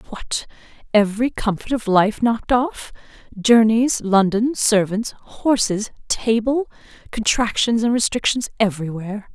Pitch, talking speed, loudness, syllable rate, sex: 220 Hz, 105 wpm, -19 LUFS, 4.4 syllables/s, female